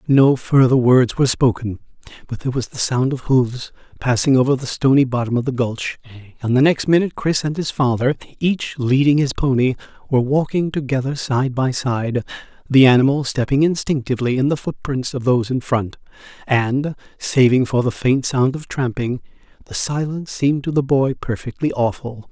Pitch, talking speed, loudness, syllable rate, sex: 130 Hz, 175 wpm, -18 LUFS, 5.3 syllables/s, male